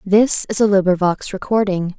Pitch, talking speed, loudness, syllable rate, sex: 195 Hz, 150 wpm, -17 LUFS, 4.9 syllables/s, female